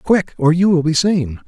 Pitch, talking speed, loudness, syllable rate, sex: 165 Hz, 245 wpm, -15 LUFS, 4.7 syllables/s, male